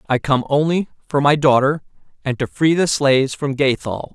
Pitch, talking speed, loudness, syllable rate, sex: 140 Hz, 190 wpm, -18 LUFS, 5.2 syllables/s, male